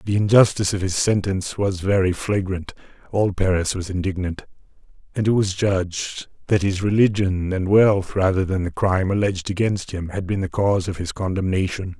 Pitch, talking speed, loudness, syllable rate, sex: 95 Hz, 175 wpm, -21 LUFS, 5.4 syllables/s, male